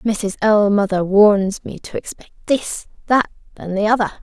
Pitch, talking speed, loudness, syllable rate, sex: 210 Hz, 155 wpm, -17 LUFS, 4.4 syllables/s, female